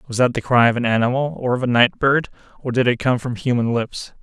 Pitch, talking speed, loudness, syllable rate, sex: 125 Hz, 270 wpm, -19 LUFS, 6.0 syllables/s, male